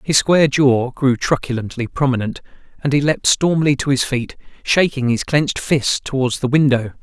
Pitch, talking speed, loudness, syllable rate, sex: 135 Hz, 170 wpm, -17 LUFS, 5.2 syllables/s, male